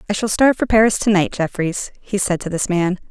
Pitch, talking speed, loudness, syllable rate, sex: 195 Hz, 250 wpm, -18 LUFS, 5.5 syllables/s, female